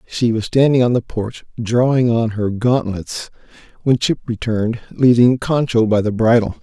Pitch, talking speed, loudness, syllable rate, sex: 115 Hz, 165 wpm, -17 LUFS, 4.7 syllables/s, male